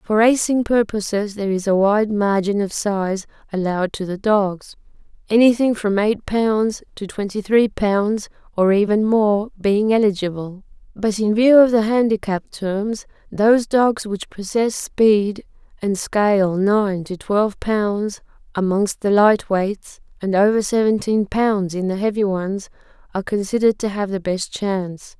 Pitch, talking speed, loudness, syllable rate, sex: 205 Hz, 150 wpm, -19 LUFS, 4.3 syllables/s, female